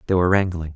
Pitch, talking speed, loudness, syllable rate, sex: 90 Hz, 240 wpm, -20 LUFS, 8.8 syllables/s, male